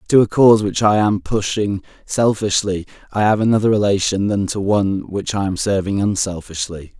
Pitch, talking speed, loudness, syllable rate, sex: 100 Hz, 170 wpm, -18 LUFS, 5.2 syllables/s, male